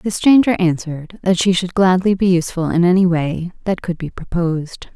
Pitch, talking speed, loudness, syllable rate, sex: 180 Hz, 195 wpm, -16 LUFS, 5.3 syllables/s, female